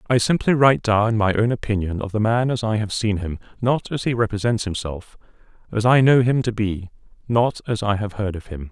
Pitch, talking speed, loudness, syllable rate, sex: 110 Hz, 225 wpm, -20 LUFS, 5.4 syllables/s, male